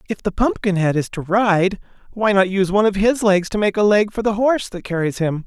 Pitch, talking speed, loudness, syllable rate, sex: 195 Hz, 255 wpm, -18 LUFS, 5.8 syllables/s, male